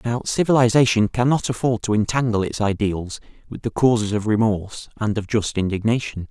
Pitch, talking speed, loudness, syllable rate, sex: 110 Hz, 160 wpm, -20 LUFS, 5.5 syllables/s, male